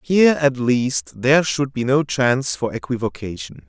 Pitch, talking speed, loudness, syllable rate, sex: 130 Hz, 165 wpm, -19 LUFS, 4.8 syllables/s, male